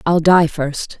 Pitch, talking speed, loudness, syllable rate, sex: 160 Hz, 180 wpm, -15 LUFS, 3.5 syllables/s, female